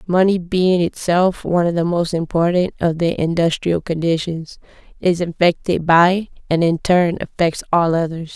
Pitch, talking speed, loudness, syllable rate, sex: 170 Hz, 150 wpm, -17 LUFS, 4.6 syllables/s, female